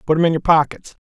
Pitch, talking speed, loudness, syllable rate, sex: 160 Hz, 280 wpm, -17 LUFS, 7.0 syllables/s, male